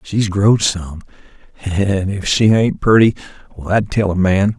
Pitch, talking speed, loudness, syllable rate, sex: 100 Hz, 155 wpm, -15 LUFS, 4.3 syllables/s, male